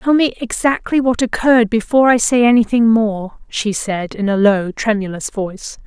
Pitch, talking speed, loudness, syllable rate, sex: 225 Hz, 175 wpm, -15 LUFS, 5.0 syllables/s, female